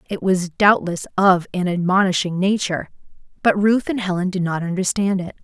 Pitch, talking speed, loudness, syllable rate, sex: 185 Hz, 165 wpm, -19 LUFS, 5.3 syllables/s, female